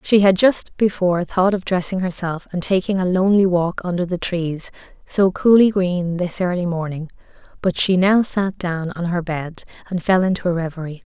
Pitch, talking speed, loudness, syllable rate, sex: 180 Hz, 185 wpm, -19 LUFS, 5.0 syllables/s, female